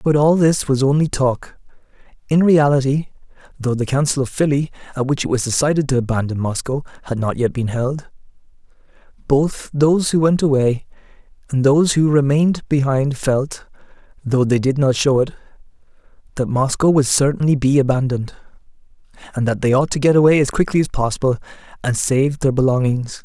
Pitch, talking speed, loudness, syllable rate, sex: 135 Hz, 165 wpm, -17 LUFS, 5.2 syllables/s, male